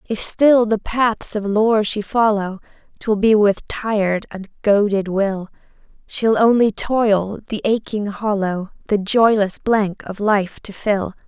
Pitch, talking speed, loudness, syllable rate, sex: 210 Hz, 150 wpm, -18 LUFS, 3.7 syllables/s, female